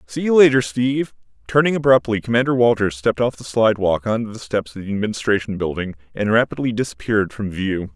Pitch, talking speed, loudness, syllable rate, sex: 110 Hz, 180 wpm, -19 LUFS, 6.3 syllables/s, male